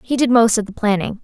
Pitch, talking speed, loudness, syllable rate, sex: 225 Hz, 290 wpm, -16 LUFS, 6.2 syllables/s, female